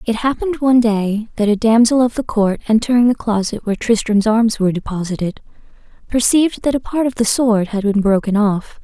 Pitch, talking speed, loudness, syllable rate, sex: 225 Hz, 195 wpm, -16 LUFS, 5.7 syllables/s, female